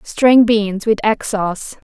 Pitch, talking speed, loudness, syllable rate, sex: 215 Hz, 155 wpm, -15 LUFS, 3.5 syllables/s, female